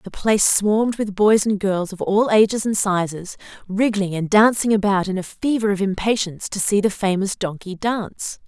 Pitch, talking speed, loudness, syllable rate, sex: 200 Hz, 190 wpm, -19 LUFS, 5.1 syllables/s, female